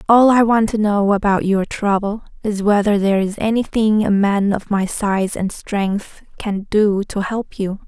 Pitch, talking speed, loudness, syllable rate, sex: 205 Hz, 190 wpm, -17 LUFS, 4.3 syllables/s, female